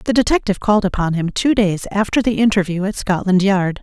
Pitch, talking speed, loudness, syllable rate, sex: 200 Hz, 205 wpm, -17 LUFS, 5.8 syllables/s, female